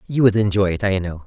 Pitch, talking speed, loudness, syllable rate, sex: 100 Hz, 285 wpm, -19 LUFS, 6.3 syllables/s, male